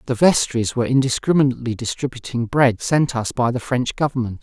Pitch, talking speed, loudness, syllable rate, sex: 125 Hz, 165 wpm, -19 LUFS, 5.9 syllables/s, male